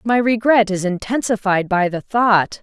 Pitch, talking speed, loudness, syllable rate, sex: 210 Hz, 160 wpm, -17 LUFS, 4.4 syllables/s, female